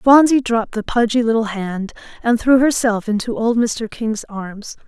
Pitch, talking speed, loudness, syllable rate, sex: 230 Hz, 170 wpm, -17 LUFS, 4.5 syllables/s, female